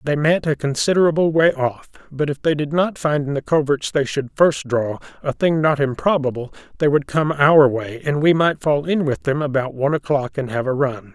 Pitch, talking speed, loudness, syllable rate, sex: 145 Hz, 225 wpm, -19 LUFS, 5.2 syllables/s, male